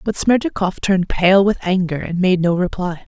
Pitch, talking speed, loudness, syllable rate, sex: 185 Hz, 190 wpm, -17 LUFS, 5.1 syllables/s, female